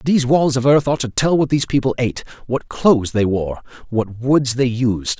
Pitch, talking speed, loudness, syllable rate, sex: 125 Hz, 220 wpm, -18 LUFS, 5.3 syllables/s, male